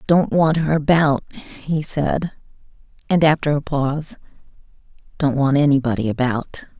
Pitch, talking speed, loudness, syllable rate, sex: 145 Hz, 125 wpm, -19 LUFS, 4.6 syllables/s, female